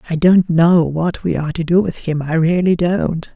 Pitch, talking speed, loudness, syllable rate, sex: 170 Hz, 230 wpm, -16 LUFS, 4.8 syllables/s, male